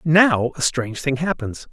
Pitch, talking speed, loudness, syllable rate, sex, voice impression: 145 Hz, 175 wpm, -20 LUFS, 4.5 syllables/s, male, masculine, adult-like, clear, slightly fluent, refreshing, friendly, slightly intense